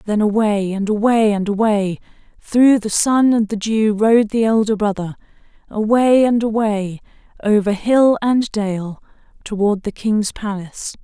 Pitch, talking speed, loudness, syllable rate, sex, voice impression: 215 Hz, 140 wpm, -17 LUFS, 4.2 syllables/s, female, gender-neutral, slightly young, tensed, slightly clear, refreshing, slightly friendly